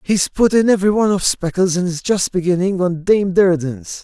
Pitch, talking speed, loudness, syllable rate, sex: 185 Hz, 210 wpm, -16 LUFS, 5.3 syllables/s, male